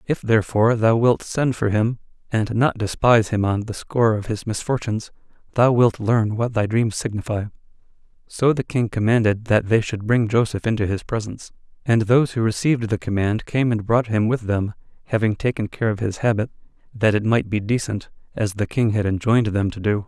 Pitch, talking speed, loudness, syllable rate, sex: 110 Hz, 200 wpm, -21 LUFS, 5.5 syllables/s, male